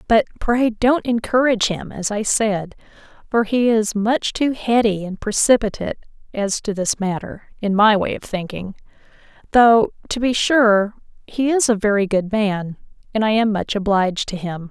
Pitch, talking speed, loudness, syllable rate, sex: 215 Hz, 170 wpm, -19 LUFS, 4.7 syllables/s, female